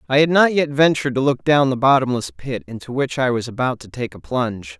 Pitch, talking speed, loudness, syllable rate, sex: 125 Hz, 250 wpm, -19 LUFS, 5.9 syllables/s, male